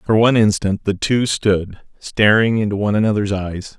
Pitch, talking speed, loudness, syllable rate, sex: 105 Hz, 175 wpm, -17 LUFS, 5.1 syllables/s, male